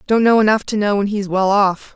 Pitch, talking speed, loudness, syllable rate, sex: 205 Hz, 275 wpm, -16 LUFS, 5.5 syllables/s, female